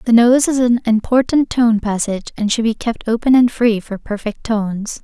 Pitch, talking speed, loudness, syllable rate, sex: 230 Hz, 205 wpm, -16 LUFS, 5.0 syllables/s, female